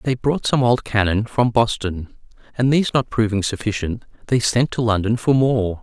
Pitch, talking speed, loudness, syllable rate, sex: 115 Hz, 185 wpm, -19 LUFS, 5.0 syllables/s, male